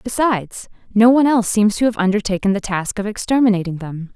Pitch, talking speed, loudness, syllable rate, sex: 210 Hz, 190 wpm, -17 LUFS, 6.3 syllables/s, female